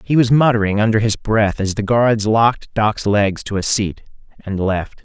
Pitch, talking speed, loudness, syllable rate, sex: 110 Hz, 200 wpm, -17 LUFS, 4.6 syllables/s, male